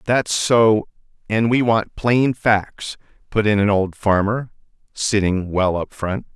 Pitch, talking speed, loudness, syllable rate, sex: 105 Hz, 140 wpm, -19 LUFS, 3.6 syllables/s, male